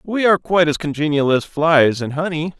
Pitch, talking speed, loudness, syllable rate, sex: 160 Hz, 210 wpm, -17 LUFS, 5.5 syllables/s, male